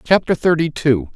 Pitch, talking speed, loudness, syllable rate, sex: 150 Hz, 155 wpm, -17 LUFS, 4.8 syllables/s, male